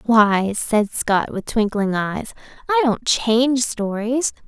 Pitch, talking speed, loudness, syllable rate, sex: 225 Hz, 135 wpm, -19 LUFS, 3.4 syllables/s, female